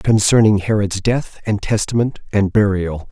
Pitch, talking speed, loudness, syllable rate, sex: 105 Hz, 135 wpm, -17 LUFS, 4.5 syllables/s, male